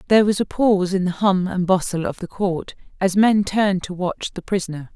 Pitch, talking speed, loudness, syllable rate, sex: 190 Hz, 230 wpm, -20 LUFS, 5.5 syllables/s, female